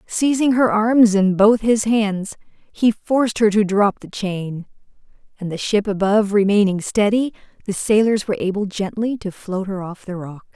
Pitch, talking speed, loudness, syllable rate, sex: 205 Hz, 175 wpm, -18 LUFS, 4.6 syllables/s, female